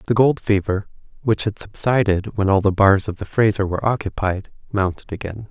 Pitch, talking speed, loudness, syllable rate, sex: 100 Hz, 185 wpm, -20 LUFS, 5.5 syllables/s, male